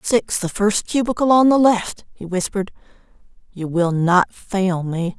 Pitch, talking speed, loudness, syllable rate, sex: 200 Hz, 160 wpm, -18 LUFS, 4.3 syllables/s, female